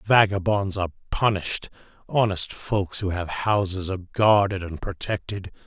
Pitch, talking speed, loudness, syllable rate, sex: 95 Hz, 125 wpm, -24 LUFS, 4.8 syllables/s, male